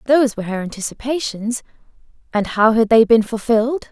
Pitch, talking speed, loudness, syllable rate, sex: 230 Hz, 140 wpm, -17 LUFS, 5.9 syllables/s, female